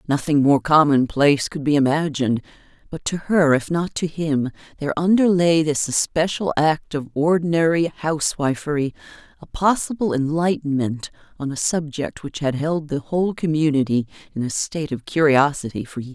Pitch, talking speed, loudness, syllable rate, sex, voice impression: 150 Hz, 150 wpm, -20 LUFS, 5.2 syllables/s, female, slightly masculine, feminine, very gender-neutral, adult-like, slightly middle-aged, slightly thin, tensed, slightly powerful, bright, slightly soft, clear, fluent, slightly raspy, cool, very intellectual, refreshing, sincere, very calm, slightly friendly, reassuring, very unique, slightly elegant, wild, lively, kind